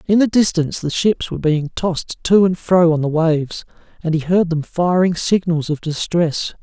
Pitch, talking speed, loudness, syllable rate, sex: 170 Hz, 200 wpm, -17 LUFS, 5.0 syllables/s, male